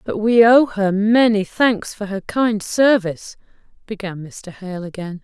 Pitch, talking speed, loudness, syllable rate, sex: 205 Hz, 160 wpm, -17 LUFS, 4.1 syllables/s, female